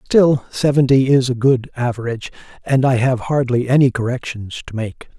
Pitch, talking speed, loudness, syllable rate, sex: 125 Hz, 160 wpm, -17 LUFS, 5.0 syllables/s, male